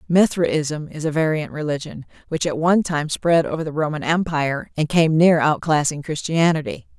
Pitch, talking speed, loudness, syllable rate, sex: 155 Hz, 165 wpm, -20 LUFS, 5.1 syllables/s, female